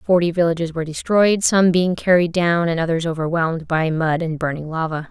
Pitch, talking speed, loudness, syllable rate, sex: 170 Hz, 190 wpm, -19 LUFS, 5.5 syllables/s, female